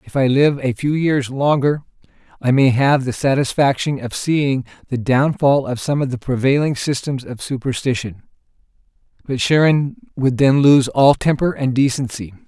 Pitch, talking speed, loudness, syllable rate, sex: 135 Hz, 160 wpm, -17 LUFS, 4.6 syllables/s, male